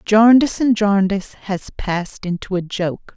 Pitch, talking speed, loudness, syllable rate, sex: 200 Hz, 150 wpm, -18 LUFS, 4.6 syllables/s, female